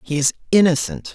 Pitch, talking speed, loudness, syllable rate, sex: 150 Hz, 160 wpm, -18 LUFS, 5.8 syllables/s, male